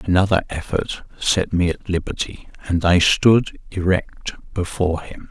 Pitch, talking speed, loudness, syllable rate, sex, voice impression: 90 Hz, 135 wpm, -20 LUFS, 4.2 syllables/s, male, very masculine, middle-aged, cool, calm, mature, elegant, slightly wild